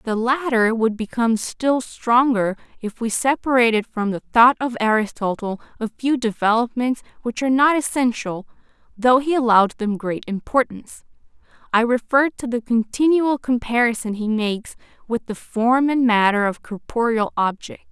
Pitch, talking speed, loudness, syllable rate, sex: 235 Hz, 145 wpm, -20 LUFS, 4.8 syllables/s, female